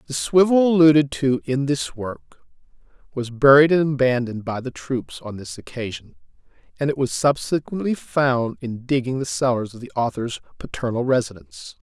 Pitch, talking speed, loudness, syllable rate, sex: 130 Hz, 155 wpm, -21 LUFS, 5.2 syllables/s, male